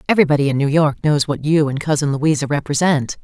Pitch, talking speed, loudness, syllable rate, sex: 145 Hz, 205 wpm, -17 LUFS, 6.2 syllables/s, female